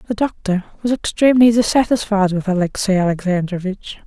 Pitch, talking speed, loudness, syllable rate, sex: 205 Hz, 120 wpm, -17 LUFS, 5.8 syllables/s, female